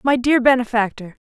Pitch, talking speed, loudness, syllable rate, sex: 240 Hz, 140 wpm, -17 LUFS, 5.5 syllables/s, female